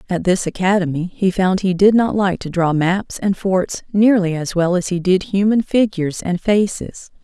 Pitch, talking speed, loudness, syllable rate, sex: 185 Hz, 200 wpm, -17 LUFS, 4.7 syllables/s, female